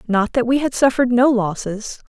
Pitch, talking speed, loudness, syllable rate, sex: 235 Hz, 200 wpm, -17 LUFS, 5.4 syllables/s, female